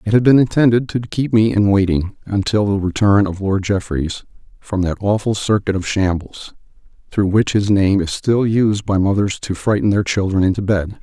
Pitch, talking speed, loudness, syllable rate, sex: 100 Hz, 195 wpm, -17 LUFS, 5.0 syllables/s, male